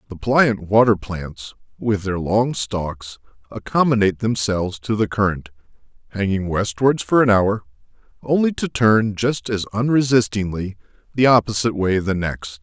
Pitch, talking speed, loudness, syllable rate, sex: 105 Hz, 140 wpm, -19 LUFS, 4.6 syllables/s, male